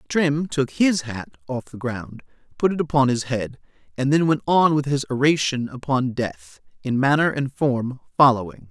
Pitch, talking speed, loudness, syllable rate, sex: 135 Hz, 165 wpm, -21 LUFS, 4.5 syllables/s, male